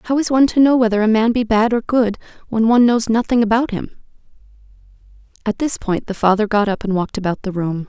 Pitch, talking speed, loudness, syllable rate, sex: 220 Hz, 230 wpm, -17 LUFS, 6.2 syllables/s, female